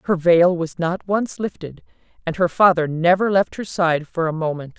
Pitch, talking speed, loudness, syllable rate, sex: 175 Hz, 200 wpm, -19 LUFS, 4.8 syllables/s, female